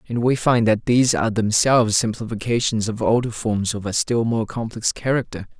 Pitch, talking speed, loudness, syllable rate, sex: 115 Hz, 180 wpm, -20 LUFS, 5.4 syllables/s, male